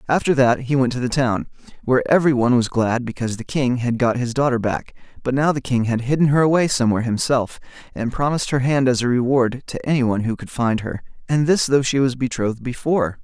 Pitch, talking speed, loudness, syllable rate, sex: 130 Hz, 230 wpm, -19 LUFS, 6.3 syllables/s, male